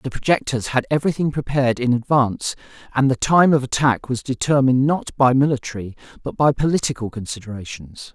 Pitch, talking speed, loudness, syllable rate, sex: 130 Hz, 155 wpm, -19 LUFS, 5.9 syllables/s, male